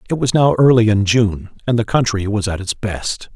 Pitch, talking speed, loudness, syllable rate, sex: 110 Hz, 235 wpm, -16 LUFS, 5.1 syllables/s, male